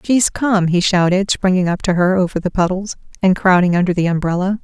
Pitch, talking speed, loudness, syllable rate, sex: 185 Hz, 205 wpm, -16 LUFS, 5.6 syllables/s, female